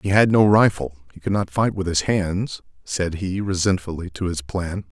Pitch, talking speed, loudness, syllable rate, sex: 90 Hz, 205 wpm, -21 LUFS, 4.8 syllables/s, male